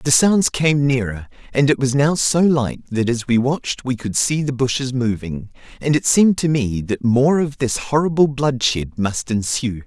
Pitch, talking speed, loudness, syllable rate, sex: 130 Hz, 200 wpm, -18 LUFS, 4.6 syllables/s, male